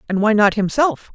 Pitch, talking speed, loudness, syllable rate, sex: 215 Hz, 210 wpm, -17 LUFS, 5.2 syllables/s, female